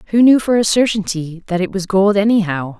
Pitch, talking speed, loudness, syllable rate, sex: 195 Hz, 215 wpm, -15 LUFS, 5.7 syllables/s, female